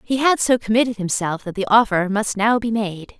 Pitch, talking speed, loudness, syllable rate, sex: 220 Hz, 225 wpm, -19 LUFS, 5.2 syllables/s, female